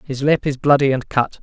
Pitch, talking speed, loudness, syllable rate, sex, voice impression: 140 Hz, 250 wpm, -17 LUFS, 5.3 syllables/s, male, masculine, adult-like, tensed, powerful, slightly muffled, fluent, slightly raspy, cool, intellectual, slightly refreshing, wild, lively, slightly intense, sharp